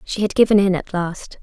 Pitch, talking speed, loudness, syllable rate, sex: 190 Hz, 250 wpm, -18 LUFS, 5.3 syllables/s, female